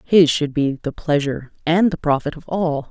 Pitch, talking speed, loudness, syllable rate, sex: 155 Hz, 205 wpm, -19 LUFS, 4.9 syllables/s, female